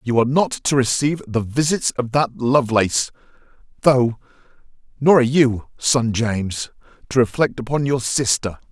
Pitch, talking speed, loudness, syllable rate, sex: 125 Hz, 140 wpm, -19 LUFS, 5.1 syllables/s, male